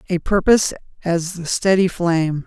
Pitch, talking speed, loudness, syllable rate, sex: 175 Hz, 145 wpm, -18 LUFS, 5.1 syllables/s, female